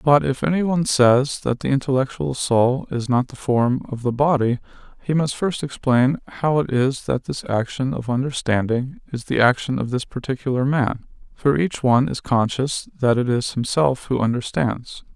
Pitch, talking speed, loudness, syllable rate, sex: 130 Hz, 180 wpm, -21 LUFS, 4.8 syllables/s, male